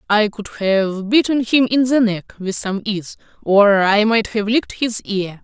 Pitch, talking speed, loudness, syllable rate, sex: 215 Hz, 200 wpm, -17 LUFS, 4.2 syllables/s, female